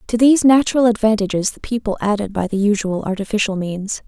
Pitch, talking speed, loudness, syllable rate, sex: 215 Hz, 175 wpm, -17 LUFS, 6.1 syllables/s, female